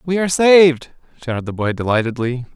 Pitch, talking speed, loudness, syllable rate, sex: 140 Hz, 165 wpm, -16 LUFS, 6.3 syllables/s, male